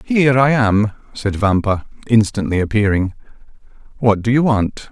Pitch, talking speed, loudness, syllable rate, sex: 110 Hz, 135 wpm, -16 LUFS, 4.8 syllables/s, male